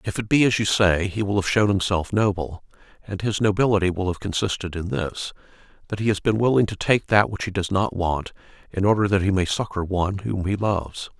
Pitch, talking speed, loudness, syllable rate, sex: 100 Hz, 230 wpm, -22 LUFS, 5.7 syllables/s, male